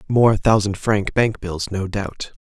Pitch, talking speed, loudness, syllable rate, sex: 105 Hz, 175 wpm, -20 LUFS, 3.7 syllables/s, male